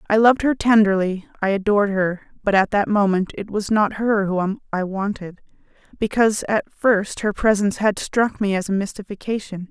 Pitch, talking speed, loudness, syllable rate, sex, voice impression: 205 Hz, 180 wpm, -20 LUFS, 5.1 syllables/s, female, feminine, adult-like, slightly tensed, bright, soft, slightly clear, intellectual, friendly, reassuring, elegant, kind, modest